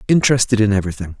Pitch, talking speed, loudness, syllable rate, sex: 110 Hz, 150 wpm, -16 LUFS, 8.7 syllables/s, male